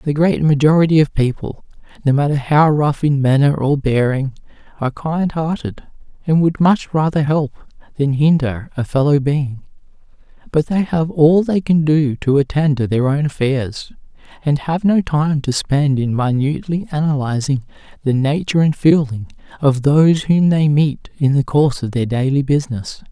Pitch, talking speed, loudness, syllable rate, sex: 145 Hz, 165 wpm, -16 LUFS, 4.8 syllables/s, male